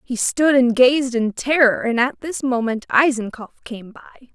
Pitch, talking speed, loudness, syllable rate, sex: 250 Hz, 180 wpm, -18 LUFS, 4.5 syllables/s, female